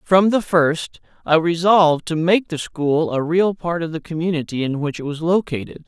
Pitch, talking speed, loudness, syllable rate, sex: 165 Hz, 205 wpm, -19 LUFS, 4.9 syllables/s, male